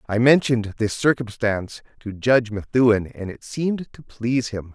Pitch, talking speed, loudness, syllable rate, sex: 115 Hz, 165 wpm, -21 LUFS, 5.1 syllables/s, male